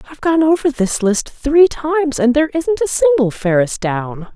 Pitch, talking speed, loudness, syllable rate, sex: 270 Hz, 195 wpm, -15 LUFS, 5.0 syllables/s, female